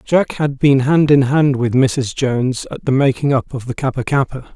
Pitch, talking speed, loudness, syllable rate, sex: 135 Hz, 225 wpm, -16 LUFS, 4.8 syllables/s, male